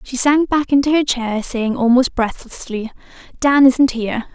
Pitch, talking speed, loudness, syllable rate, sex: 255 Hz, 165 wpm, -16 LUFS, 4.6 syllables/s, female